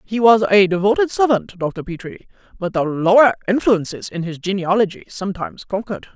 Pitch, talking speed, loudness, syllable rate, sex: 200 Hz, 155 wpm, -18 LUFS, 5.7 syllables/s, female